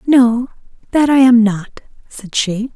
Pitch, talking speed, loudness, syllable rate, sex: 240 Hz, 155 wpm, -13 LUFS, 3.7 syllables/s, female